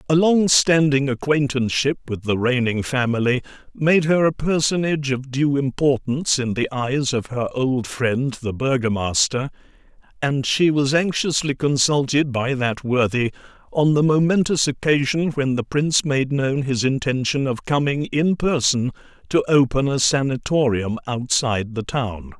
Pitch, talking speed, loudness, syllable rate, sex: 135 Hz, 140 wpm, -20 LUFS, 4.5 syllables/s, male